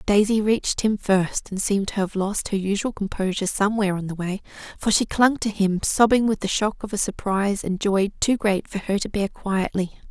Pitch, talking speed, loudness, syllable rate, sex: 200 Hz, 225 wpm, -23 LUFS, 5.6 syllables/s, female